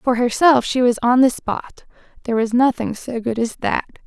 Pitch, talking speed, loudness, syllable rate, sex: 240 Hz, 205 wpm, -18 LUFS, 4.9 syllables/s, female